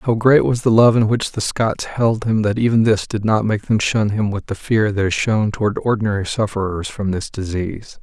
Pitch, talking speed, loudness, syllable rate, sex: 105 Hz, 240 wpm, -18 LUFS, 5.2 syllables/s, male